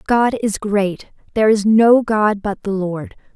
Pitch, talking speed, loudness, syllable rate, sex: 215 Hz, 180 wpm, -16 LUFS, 4.0 syllables/s, female